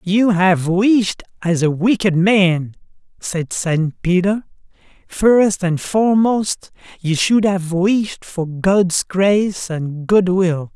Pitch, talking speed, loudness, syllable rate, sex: 185 Hz, 125 wpm, -17 LUFS, 3.1 syllables/s, male